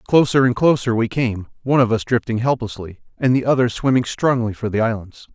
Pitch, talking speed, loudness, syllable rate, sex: 120 Hz, 200 wpm, -19 LUFS, 5.7 syllables/s, male